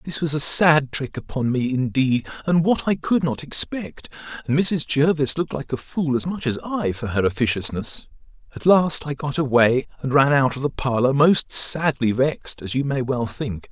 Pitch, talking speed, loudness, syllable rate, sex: 140 Hz, 200 wpm, -21 LUFS, 4.8 syllables/s, male